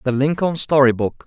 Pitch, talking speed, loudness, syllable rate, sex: 135 Hz, 190 wpm, -17 LUFS, 5.2 syllables/s, male